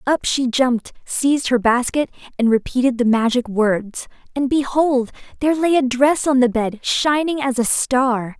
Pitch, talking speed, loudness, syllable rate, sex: 255 Hz, 170 wpm, -18 LUFS, 4.5 syllables/s, female